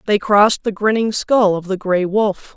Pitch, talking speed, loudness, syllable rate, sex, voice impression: 205 Hz, 210 wpm, -16 LUFS, 4.6 syllables/s, female, feminine, adult-like, slightly relaxed, slightly hard, muffled, fluent, intellectual, calm, reassuring, modest